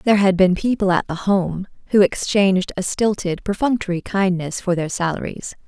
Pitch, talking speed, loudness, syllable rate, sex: 190 Hz, 170 wpm, -19 LUFS, 5.2 syllables/s, female